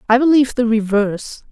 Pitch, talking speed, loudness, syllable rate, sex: 235 Hz, 160 wpm, -15 LUFS, 6.3 syllables/s, female